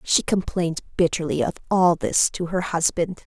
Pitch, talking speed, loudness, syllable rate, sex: 175 Hz, 160 wpm, -22 LUFS, 5.0 syllables/s, female